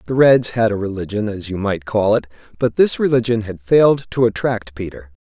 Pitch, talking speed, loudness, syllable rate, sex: 110 Hz, 205 wpm, -17 LUFS, 5.4 syllables/s, male